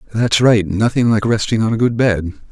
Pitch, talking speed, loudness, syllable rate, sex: 110 Hz, 215 wpm, -15 LUFS, 5.3 syllables/s, male